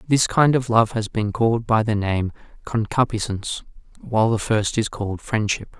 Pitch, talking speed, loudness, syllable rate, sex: 110 Hz, 175 wpm, -21 LUFS, 5.1 syllables/s, male